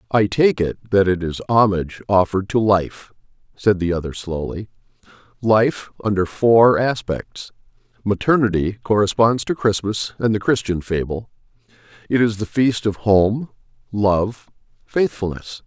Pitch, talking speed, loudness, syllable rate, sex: 105 Hz, 125 wpm, -19 LUFS, 4.5 syllables/s, male